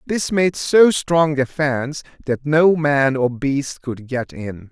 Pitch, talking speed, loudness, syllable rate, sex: 140 Hz, 180 wpm, -18 LUFS, 3.5 syllables/s, male